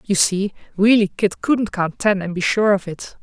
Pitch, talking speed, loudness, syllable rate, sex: 200 Hz, 225 wpm, -18 LUFS, 4.6 syllables/s, female